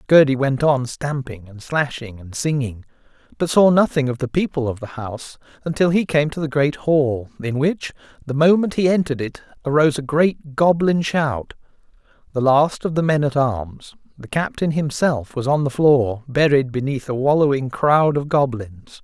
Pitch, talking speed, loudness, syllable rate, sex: 140 Hz, 180 wpm, -19 LUFS, 4.8 syllables/s, male